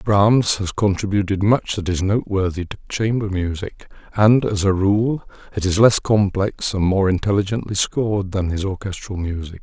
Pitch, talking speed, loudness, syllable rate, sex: 100 Hz, 160 wpm, -19 LUFS, 4.9 syllables/s, male